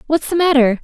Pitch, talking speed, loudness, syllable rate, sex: 290 Hz, 215 wpm, -15 LUFS, 6.1 syllables/s, female